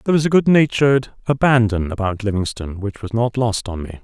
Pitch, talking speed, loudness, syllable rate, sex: 115 Hz, 195 wpm, -18 LUFS, 6.2 syllables/s, male